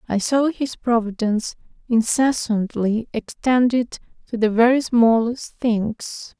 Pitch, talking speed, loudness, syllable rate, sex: 230 Hz, 105 wpm, -20 LUFS, 3.8 syllables/s, female